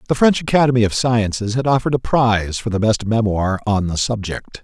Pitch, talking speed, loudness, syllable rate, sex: 115 Hz, 205 wpm, -18 LUFS, 5.9 syllables/s, male